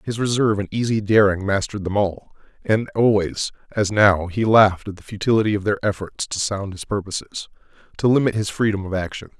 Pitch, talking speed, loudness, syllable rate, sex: 105 Hz, 190 wpm, -20 LUFS, 5.8 syllables/s, male